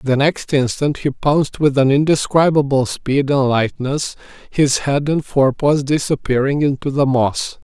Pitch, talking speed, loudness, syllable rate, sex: 140 Hz, 150 wpm, -17 LUFS, 4.4 syllables/s, male